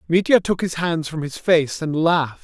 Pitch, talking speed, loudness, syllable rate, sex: 160 Hz, 220 wpm, -20 LUFS, 4.9 syllables/s, male